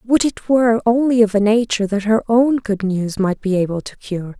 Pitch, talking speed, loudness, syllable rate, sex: 215 Hz, 230 wpm, -17 LUFS, 5.1 syllables/s, female